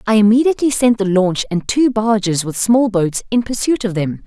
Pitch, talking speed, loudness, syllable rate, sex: 215 Hz, 210 wpm, -15 LUFS, 5.2 syllables/s, female